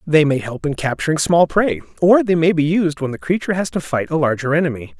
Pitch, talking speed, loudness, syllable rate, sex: 160 Hz, 255 wpm, -17 LUFS, 6.0 syllables/s, male